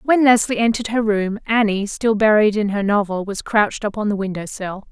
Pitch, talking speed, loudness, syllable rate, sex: 210 Hz, 220 wpm, -18 LUFS, 5.4 syllables/s, female